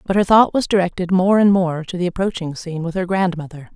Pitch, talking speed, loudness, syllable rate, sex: 180 Hz, 240 wpm, -18 LUFS, 6.1 syllables/s, female